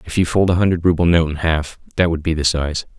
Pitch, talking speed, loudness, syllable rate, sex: 85 Hz, 280 wpm, -18 LUFS, 6.1 syllables/s, male